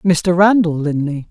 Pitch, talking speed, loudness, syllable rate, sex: 170 Hz, 140 wpm, -15 LUFS, 3.9 syllables/s, female